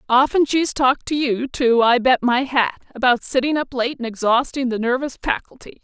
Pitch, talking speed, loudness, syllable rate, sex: 255 Hz, 195 wpm, -19 LUFS, 5.2 syllables/s, female